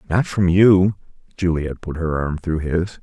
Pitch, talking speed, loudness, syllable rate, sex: 90 Hz, 180 wpm, -19 LUFS, 4.3 syllables/s, male